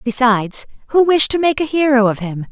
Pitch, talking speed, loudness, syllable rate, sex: 255 Hz, 215 wpm, -15 LUFS, 5.6 syllables/s, female